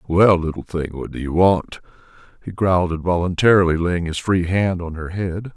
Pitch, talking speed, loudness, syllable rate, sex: 90 Hz, 185 wpm, -19 LUFS, 5.1 syllables/s, male